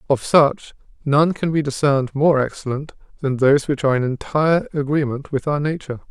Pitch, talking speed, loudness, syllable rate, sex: 140 Hz, 175 wpm, -19 LUFS, 5.7 syllables/s, male